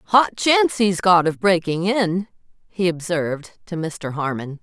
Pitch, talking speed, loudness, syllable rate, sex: 180 Hz, 155 wpm, -20 LUFS, 4.2 syllables/s, female